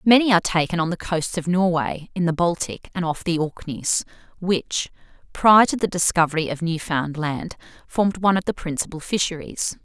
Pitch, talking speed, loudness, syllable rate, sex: 170 Hz, 170 wpm, -22 LUFS, 5.3 syllables/s, female